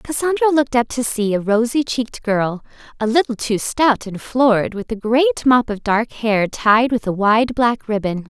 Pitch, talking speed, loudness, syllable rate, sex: 235 Hz, 200 wpm, -18 LUFS, 4.6 syllables/s, female